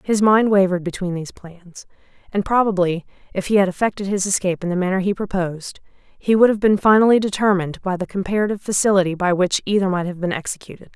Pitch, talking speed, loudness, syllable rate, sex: 190 Hz, 195 wpm, -19 LUFS, 6.5 syllables/s, female